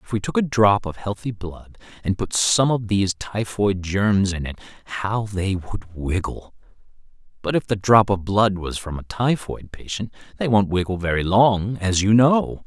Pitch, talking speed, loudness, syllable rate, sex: 100 Hz, 190 wpm, -21 LUFS, 4.5 syllables/s, male